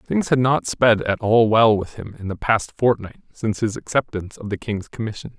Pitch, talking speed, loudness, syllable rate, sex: 110 Hz, 225 wpm, -20 LUFS, 5.2 syllables/s, male